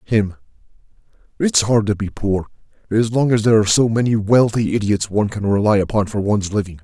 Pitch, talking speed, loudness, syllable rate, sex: 105 Hz, 195 wpm, -17 LUFS, 5.9 syllables/s, male